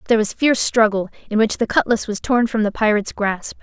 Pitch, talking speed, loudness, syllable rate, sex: 220 Hz, 230 wpm, -18 LUFS, 6.2 syllables/s, female